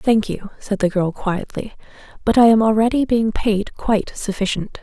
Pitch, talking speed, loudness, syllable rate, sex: 215 Hz, 175 wpm, -18 LUFS, 4.8 syllables/s, female